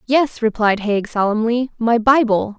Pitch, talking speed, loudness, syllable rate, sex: 230 Hz, 140 wpm, -17 LUFS, 4.2 syllables/s, female